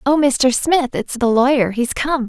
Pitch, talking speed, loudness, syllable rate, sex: 260 Hz, 185 wpm, -16 LUFS, 4.2 syllables/s, female